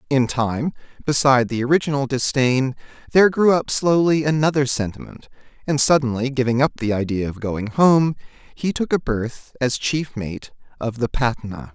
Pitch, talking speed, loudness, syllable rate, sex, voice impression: 135 Hz, 160 wpm, -20 LUFS, 5.0 syllables/s, male, masculine, adult-like, slightly fluent, slightly cool, slightly refreshing, sincere, friendly